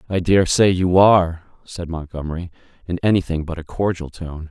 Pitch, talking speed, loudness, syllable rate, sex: 85 Hz, 160 wpm, -19 LUFS, 5.5 syllables/s, male